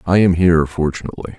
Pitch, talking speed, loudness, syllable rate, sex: 85 Hz, 175 wpm, -15 LUFS, 7.4 syllables/s, male